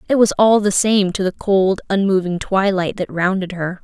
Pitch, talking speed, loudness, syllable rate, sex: 195 Hz, 205 wpm, -17 LUFS, 4.8 syllables/s, female